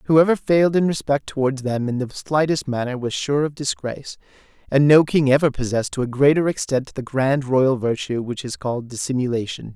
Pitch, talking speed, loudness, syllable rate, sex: 135 Hz, 190 wpm, -20 LUFS, 5.5 syllables/s, male